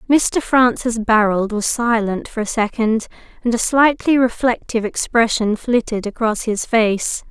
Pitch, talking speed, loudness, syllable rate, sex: 230 Hz, 140 wpm, -17 LUFS, 4.3 syllables/s, female